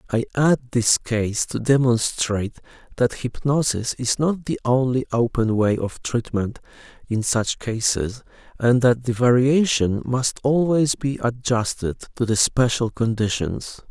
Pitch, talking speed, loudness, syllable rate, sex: 120 Hz, 135 wpm, -21 LUFS, 4.0 syllables/s, male